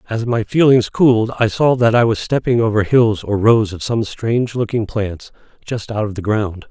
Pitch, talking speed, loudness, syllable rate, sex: 110 Hz, 215 wpm, -16 LUFS, 4.9 syllables/s, male